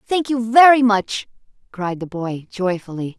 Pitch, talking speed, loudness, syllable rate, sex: 215 Hz, 150 wpm, -18 LUFS, 4.2 syllables/s, female